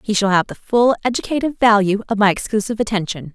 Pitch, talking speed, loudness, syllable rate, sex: 210 Hz, 195 wpm, -17 LUFS, 6.8 syllables/s, female